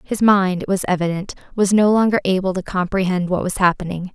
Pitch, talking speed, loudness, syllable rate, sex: 190 Hz, 200 wpm, -18 LUFS, 5.8 syllables/s, female